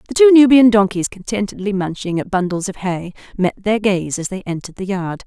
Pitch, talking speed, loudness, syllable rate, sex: 200 Hz, 205 wpm, -17 LUFS, 5.6 syllables/s, female